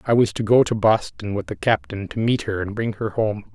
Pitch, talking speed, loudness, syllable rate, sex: 110 Hz, 270 wpm, -21 LUFS, 5.3 syllables/s, male